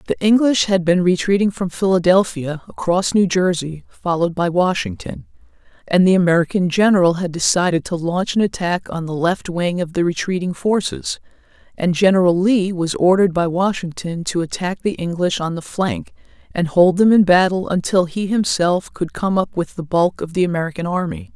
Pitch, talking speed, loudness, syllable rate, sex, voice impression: 180 Hz, 175 wpm, -18 LUFS, 5.2 syllables/s, female, feminine, very adult-like, slightly thick, very tensed, very powerful, slightly dark, slightly soft, clear, fluent, very cool, intellectual, refreshing, sincere, very calm, slightly friendly, reassuring, very unique, very elegant, wild, sweet, lively, kind, slightly intense